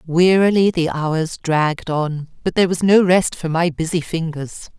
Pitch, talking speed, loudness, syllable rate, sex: 165 Hz, 175 wpm, -18 LUFS, 4.5 syllables/s, female